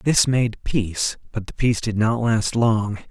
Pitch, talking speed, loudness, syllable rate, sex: 110 Hz, 195 wpm, -21 LUFS, 4.3 syllables/s, male